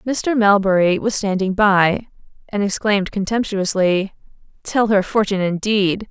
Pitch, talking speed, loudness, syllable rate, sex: 200 Hz, 120 wpm, -18 LUFS, 4.5 syllables/s, female